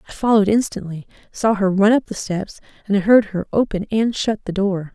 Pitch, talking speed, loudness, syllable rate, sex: 205 Hz, 205 wpm, -19 LUFS, 5.4 syllables/s, female